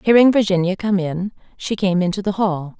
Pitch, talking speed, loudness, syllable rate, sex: 195 Hz, 195 wpm, -18 LUFS, 5.3 syllables/s, female